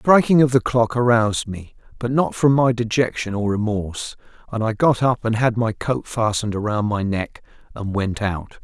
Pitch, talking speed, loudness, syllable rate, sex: 115 Hz, 200 wpm, -20 LUFS, 5.0 syllables/s, male